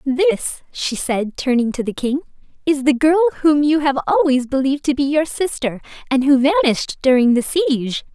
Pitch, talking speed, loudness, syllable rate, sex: 280 Hz, 185 wpm, -17 LUFS, 5.1 syllables/s, female